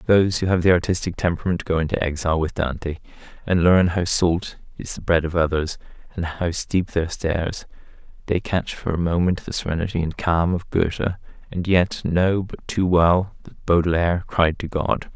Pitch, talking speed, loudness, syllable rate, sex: 85 Hz, 185 wpm, -21 LUFS, 5.2 syllables/s, male